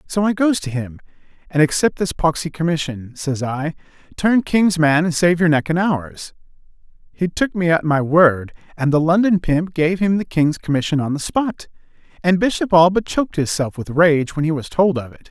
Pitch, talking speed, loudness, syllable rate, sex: 165 Hz, 210 wpm, -18 LUFS, 5.0 syllables/s, male